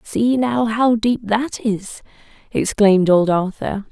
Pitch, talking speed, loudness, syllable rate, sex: 215 Hz, 140 wpm, -18 LUFS, 3.6 syllables/s, female